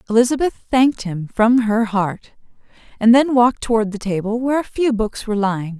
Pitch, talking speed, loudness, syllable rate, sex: 225 Hz, 185 wpm, -18 LUFS, 5.8 syllables/s, female